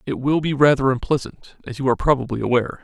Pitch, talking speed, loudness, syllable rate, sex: 130 Hz, 210 wpm, -20 LUFS, 7.0 syllables/s, male